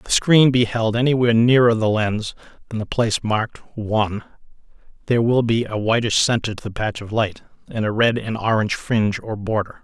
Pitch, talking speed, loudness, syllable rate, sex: 110 Hz, 200 wpm, -19 LUFS, 5.7 syllables/s, male